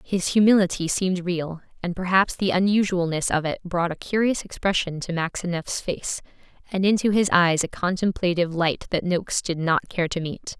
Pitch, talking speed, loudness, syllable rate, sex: 180 Hz, 175 wpm, -23 LUFS, 5.2 syllables/s, female